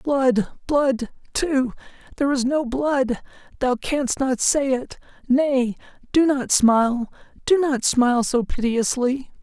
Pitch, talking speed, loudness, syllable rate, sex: 260 Hz, 100 wpm, -21 LUFS, 3.7 syllables/s, female